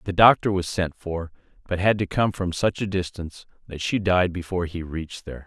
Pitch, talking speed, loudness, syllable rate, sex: 90 Hz, 220 wpm, -24 LUFS, 5.7 syllables/s, male